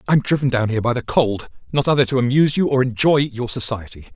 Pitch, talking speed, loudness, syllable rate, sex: 125 Hz, 230 wpm, -19 LUFS, 6.5 syllables/s, male